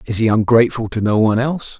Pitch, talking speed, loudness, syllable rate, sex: 115 Hz, 235 wpm, -16 LUFS, 7.2 syllables/s, male